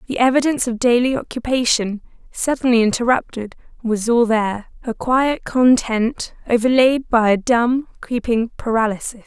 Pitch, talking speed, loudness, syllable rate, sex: 240 Hz, 115 wpm, -18 LUFS, 4.8 syllables/s, female